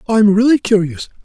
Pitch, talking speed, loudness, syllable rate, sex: 205 Hz, 145 wpm, -13 LUFS, 5.4 syllables/s, male